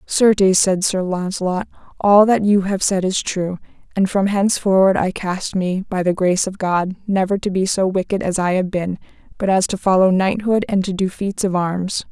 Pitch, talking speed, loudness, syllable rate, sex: 190 Hz, 210 wpm, -18 LUFS, 5.0 syllables/s, female